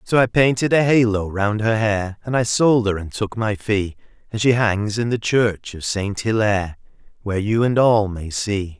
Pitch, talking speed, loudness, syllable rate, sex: 110 Hz, 210 wpm, -19 LUFS, 4.6 syllables/s, male